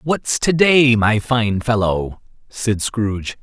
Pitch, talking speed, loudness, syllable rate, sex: 115 Hz, 140 wpm, -17 LUFS, 3.3 syllables/s, male